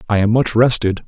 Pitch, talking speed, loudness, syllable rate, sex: 110 Hz, 225 wpm, -15 LUFS, 5.7 syllables/s, male